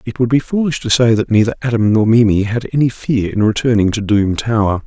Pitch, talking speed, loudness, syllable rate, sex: 115 Hz, 235 wpm, -14 LUFS, 5.8 syllables/s, male